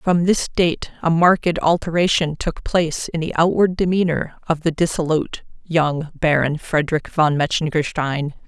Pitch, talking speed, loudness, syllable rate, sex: 160 Hz, 140 wpm, -19 LUFS, 4.8 syllables/s, female